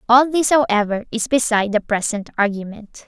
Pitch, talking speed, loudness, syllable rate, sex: 225 Hz, 155 wpm, -18 LUFS, 5.5 syllables/s, female